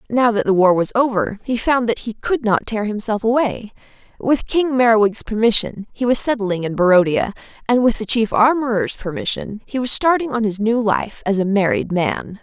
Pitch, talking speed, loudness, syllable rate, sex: 220 Hz, 200 wpm, -18 LUFS, 5.1 syllables/s, female